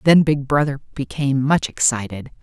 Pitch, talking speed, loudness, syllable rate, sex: 135 Hz, 150 wpm, -19 LUFS, 5.3 syllables/s, female